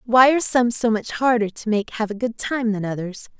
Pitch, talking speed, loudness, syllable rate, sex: 225 Hz, 250 wpm, -20 LUFS, 5.4 syllables/s, female